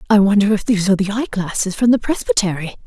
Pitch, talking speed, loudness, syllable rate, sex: 205 Hz, 230 wpm, -17 LUFS, 7.2 syllables/s, female